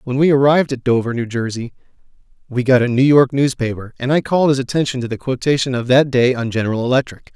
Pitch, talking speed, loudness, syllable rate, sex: 130 Hz, 220 wpm, -16 LUFS, 6.5 syllables/s, male